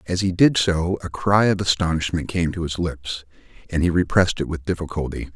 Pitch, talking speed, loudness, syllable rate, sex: 85 Hz, 200 wpm, -21 LUFS, 5.5 syllables/s, male